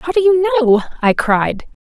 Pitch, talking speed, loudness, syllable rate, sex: 285 Hz, 190 wpm, -15 LUFS, 4.1 syllables/s, female